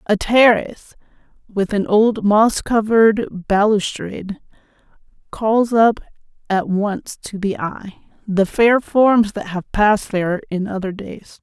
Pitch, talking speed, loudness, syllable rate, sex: 210 Hz, 130 wpm, -17 LUFS, 3.9 syllables/s, female